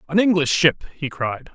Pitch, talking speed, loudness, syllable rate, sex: 160 Hz, 195 wpm, -19 LUFS, 5.2 syllables/s, male